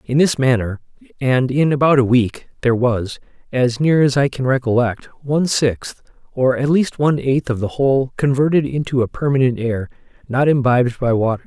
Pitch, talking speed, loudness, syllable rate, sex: 130 Hz, 185 wpm, -17 LUFS, 5.2 syllables/s, male